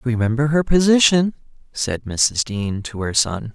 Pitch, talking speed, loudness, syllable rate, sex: 130 Hz, 150 wpm, -18 LUFS, 4.3 syllables/s, male